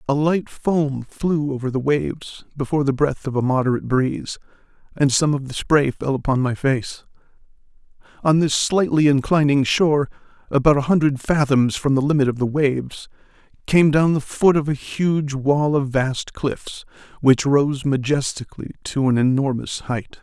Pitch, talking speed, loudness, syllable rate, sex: 140 Hz, 165 wpm, -20 LUFS, 4.8 syllables/s, male